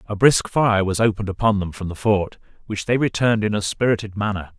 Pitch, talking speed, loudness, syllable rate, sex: 105 Hz, 220 wpm, -20 LUFS, 6.0 syllables/s, male